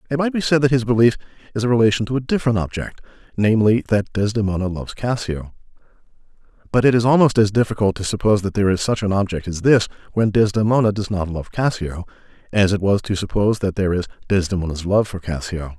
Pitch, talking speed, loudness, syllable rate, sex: 105 Hz, 200 wpm, -19 LUFS, 6.6 syllables/s, male